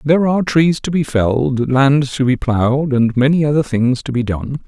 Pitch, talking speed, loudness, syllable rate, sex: 135 Hz, 220 wpm, -15 LUFS, 5.1 syllables/s, male